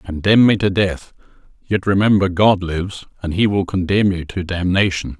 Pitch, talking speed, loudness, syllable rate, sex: 95 Hz, 175 wpm, -17 LUFS, 4.9 syllables/s, male